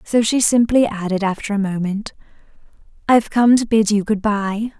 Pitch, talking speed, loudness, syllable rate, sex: 215 Hz, 175 wpm, -17 LUFS, 5.1 syllables/s, female